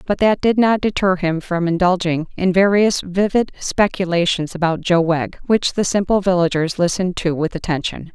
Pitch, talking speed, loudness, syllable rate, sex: 180 Hz, 170 wpm, -18 LUFS, 5.0 syllables/s, female